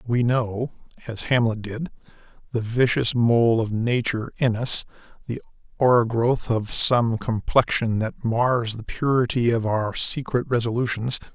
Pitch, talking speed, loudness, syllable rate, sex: 120 Hz, 120 wpm, -22 LUFS, 4.2 syllables/s, male